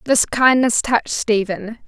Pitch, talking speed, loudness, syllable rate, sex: 230 Hz, 130 wpm, -17 LUFS, 4.1 syllables/s, female